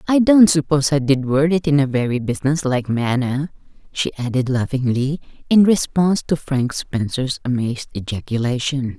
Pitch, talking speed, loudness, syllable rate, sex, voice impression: 140 Hz, 145 wpm, -18 LUFS, 5.2 syllables/s, female, very feminine, very middle-aged, thin, slightly tensed, slightly weak, bright, very soft, very clear, very fluent, cute, very intellectual, very refreshing, sincere, calm, very friendly, very reassuring, very unique, very elegant, very sweet, lively, very kind, modest